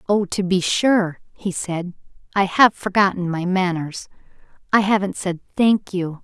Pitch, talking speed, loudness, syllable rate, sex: 190 Hz, 155 wpm, -20 LUFS, 4.3 syllables/s, female